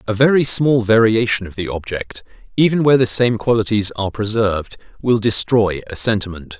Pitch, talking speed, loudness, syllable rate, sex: 110 Hz, 165 wpm, -16 LUFS, 5.5 syllables/s, male